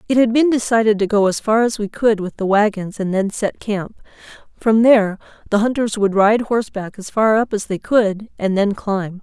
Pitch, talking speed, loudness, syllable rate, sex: 210 Hz, 220 wpm, -17 LUFS, 5.1 syllables/s, female